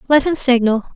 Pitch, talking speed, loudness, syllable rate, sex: 260 Hz, 190 wpm, -15 LUFS, 5.2 syllables/s, female